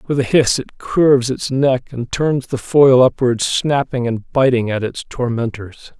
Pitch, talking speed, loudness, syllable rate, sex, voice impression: 125 Hz, 180 wpm, -16 LUFS, 4.1 syllables/s, male, masculine, middle-aged, slightly relaxed, powerful, slightly weak, slightly bright, soft, raspy, calm, mature, friendly, wild, lively, slightly strict, slightly intense